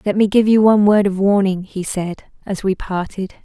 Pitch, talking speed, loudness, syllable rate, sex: 195 Hz, 225 wpm, -16 LUFS, 5.4 syllables/s, female